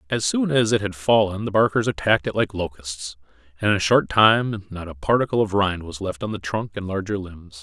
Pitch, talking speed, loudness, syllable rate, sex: 100 Hz, 235 wpm, -21 LUFS, 5.5 syllables/s, male